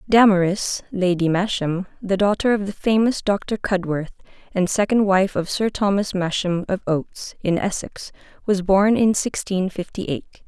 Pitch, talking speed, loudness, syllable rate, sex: 195 Hz, 155 wpm, -21 LUFS, 4.6 syllables/s, female